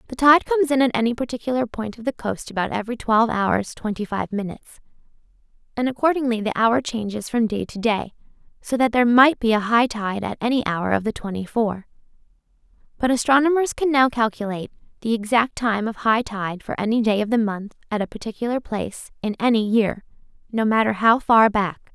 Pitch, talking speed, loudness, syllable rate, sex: 225 Hz, 195 wpm, -21 LUFS, 5.8 syllables/s, female